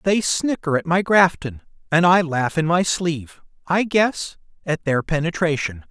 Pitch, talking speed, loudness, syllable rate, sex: 165 Hz, 165 wpm, -20 LUFS, 4.4 syllables/s, male